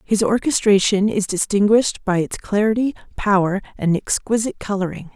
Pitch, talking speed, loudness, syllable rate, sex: 205 Hz, 130 wpm, -19 LUFS, 5.4 syllables/s, female